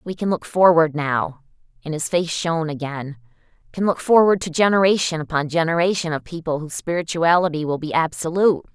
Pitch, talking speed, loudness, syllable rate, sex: 165 Hz, 150 wpm, -20 LUFS, 5.8 syllables/s, female